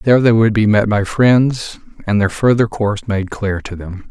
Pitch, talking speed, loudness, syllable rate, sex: 110 Hz, 220 wpm, -15 LUFS, 4.8 syllables/s, male